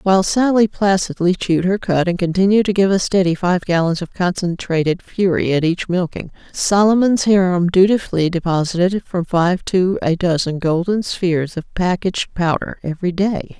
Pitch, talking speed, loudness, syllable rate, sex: 180 Hz, 160 wpm, -17 LUFS, 5.1 syllables/s, female